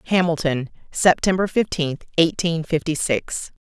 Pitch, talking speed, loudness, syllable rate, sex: 165 Hz, 100 wpm, -21 LUFS, 4.3 syllables/s, female